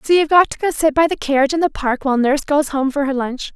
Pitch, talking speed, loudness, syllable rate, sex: 290 Hz, 320 wpm, -17 LUFS, 7.0 syllables/s, female